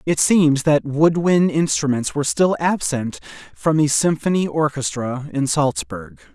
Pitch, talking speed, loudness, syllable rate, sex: 150 Hz, 140 wpm, -19 LUFS, 4.4 syllables/s, male